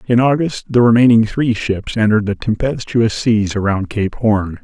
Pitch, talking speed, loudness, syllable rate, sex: 110 Hz, 170 wpm, -15 LUFS, 4.7 syllables/s, male